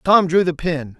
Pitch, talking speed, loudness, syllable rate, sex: 165 Hz, 240 wpm, -18 LUFS, 4.5 syllables/s, male